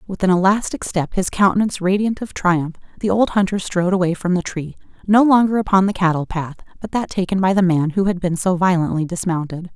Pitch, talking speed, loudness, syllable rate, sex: 185 Hz, 205 wpm, -18 LUFS, 6.0 syllables/s, female